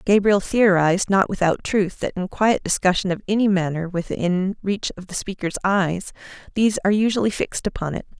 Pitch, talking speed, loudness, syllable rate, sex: 190 Hz, 175 wpm, -21 LUFS, 5.5 syllables/s, female